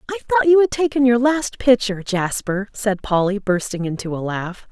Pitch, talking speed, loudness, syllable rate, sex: 230 Hz, 190 wpm, -19 LUFS, 5.3 syllables/s, female